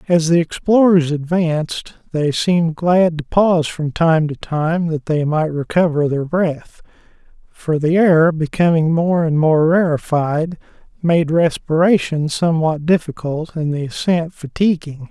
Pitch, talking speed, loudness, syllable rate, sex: 160 Hz, 140 wpm, -16 LUFS, 4.2 syllables/s, male